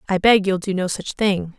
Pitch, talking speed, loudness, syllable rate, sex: 190 Hz, 265 wpm, -19 LUFS, 5.0 syllables/s, female